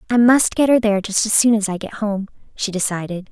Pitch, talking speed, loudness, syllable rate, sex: 210 Hz, 255 wpm, -17 LUFS, 6.0 syllables/s, female